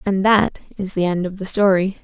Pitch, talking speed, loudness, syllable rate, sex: 190 Hz, 235 wpm, -18 LUFS, 5.2 syllables/s, female